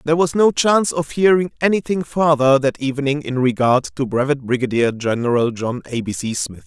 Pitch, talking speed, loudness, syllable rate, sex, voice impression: 140 Hz, 190 wpm, -18 LUFS, 5.5 syllables/s, male, very masculine, very adult-like, slightly old, very thick, tensed, very powerful, bright, slightly hard, slightly clear, fluent, slightly raspy, very cool, intellectual, refreshing, sincere, very calm, mature, very friendly, reassuring, very unique, slightly elegant, wild, sweet, lively, kind, slightly strict, slightly intense